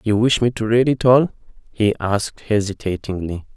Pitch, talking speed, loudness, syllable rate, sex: 110 Hz, 170 wpm, -19 LUFS, 5.1 syllables/s, male